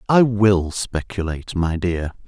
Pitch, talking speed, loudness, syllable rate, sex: 95 Hz, 130 wpm, -20 LUFS, 4.0 syllables/s, male